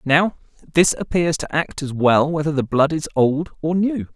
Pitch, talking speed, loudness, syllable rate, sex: 155 Hz, 200 wpm, -19 LUFS, 4.7 syllables/s, male